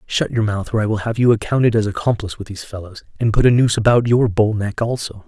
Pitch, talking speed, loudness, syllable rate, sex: 110 Hz, 260 wpm, -17 LUFS, 6.6 syllables/s, male